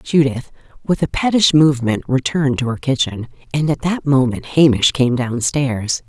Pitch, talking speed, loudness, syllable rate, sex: 135 Hz, 160 wpm, -17 LUFS, 4.8 syllables/s, female